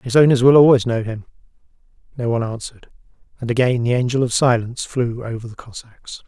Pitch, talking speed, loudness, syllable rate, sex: 120 Hz, 180 wpm, -17 LUFS, 6.3 syllables/s, male